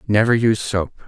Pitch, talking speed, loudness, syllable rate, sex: 110 Hz, 165 wpm, -18 LUFS, 6.2 syllables/s, male